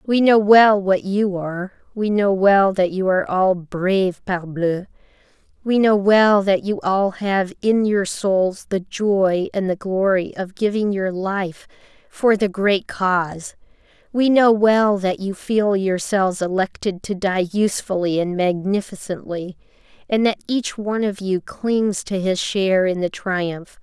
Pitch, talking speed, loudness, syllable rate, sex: 195 Hz, 160 wpm, -19 LUFS, 4.0 syllables/s, female